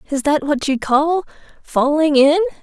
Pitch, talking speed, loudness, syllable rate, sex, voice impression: 300 Hz, 160 wpm, -16 LUFS, 4.4 syllables/s, female, feminine, very adult-like, slightly clear, intellectual, slightly elegant, slightly sweet